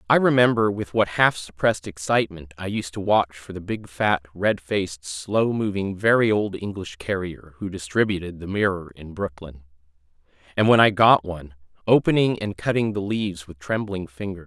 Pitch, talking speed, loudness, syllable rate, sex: 95 Hz, 175 wpm, -22 LUFS, 5.1 syllables/s, male